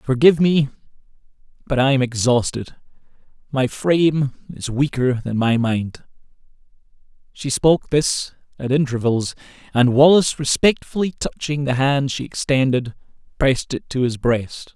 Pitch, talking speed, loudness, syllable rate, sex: 135 Hz, 120 wpm, -19 LUFS, 4.7 syllables/s, male